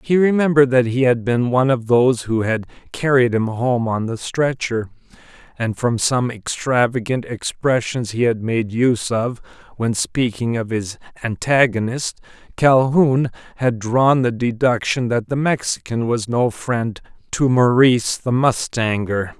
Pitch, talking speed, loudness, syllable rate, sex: 120 Hz, 145 wpm, -18 LUFS, 4.3 syllables/s, male